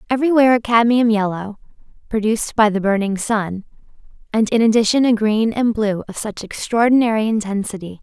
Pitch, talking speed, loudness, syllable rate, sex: 220 Hz, 150 wpm, -17 LUFS, 5.8 syllables/s, female